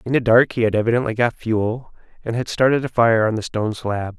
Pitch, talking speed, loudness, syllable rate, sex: 115 Hz, 245 wpm, -19 LUFS, 5.8 syllables/s, male